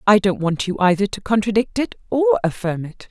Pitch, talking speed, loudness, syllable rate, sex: 210 Hz, 215 wpm, -19 LUFS, 5.6 syllables/s, female